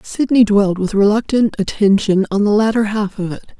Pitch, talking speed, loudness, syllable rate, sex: 210 Hz, 185 wpm, -15 LUFS, 5.1 syllables/s, female